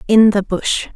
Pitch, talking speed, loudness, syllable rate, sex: 205 Hz, 190 wpm, -15 LUFS, 4.0 syllables/s, female